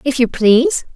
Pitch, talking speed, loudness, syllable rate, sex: 265 Hz, 190 wpm, -14 LUFS, 5.0 syllables/s, female